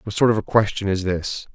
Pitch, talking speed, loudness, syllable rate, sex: 100 Hz, 270 wpm, -21 LUFS, 5.8 syllables/s, male